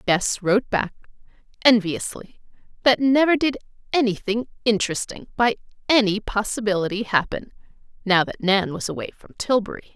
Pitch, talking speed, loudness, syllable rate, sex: 215 Hz, 120 wpm, -21 LUFS, 5.3 syllables/s, female